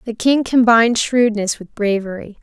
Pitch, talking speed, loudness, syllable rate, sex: 225 Hz, 150 wpm, -16 LUFS, 4.9 syllables/s, female